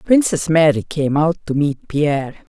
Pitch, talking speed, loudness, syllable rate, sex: 155 Hz, 165 wpm, -17 LUFS, 4.2 syllables/s, female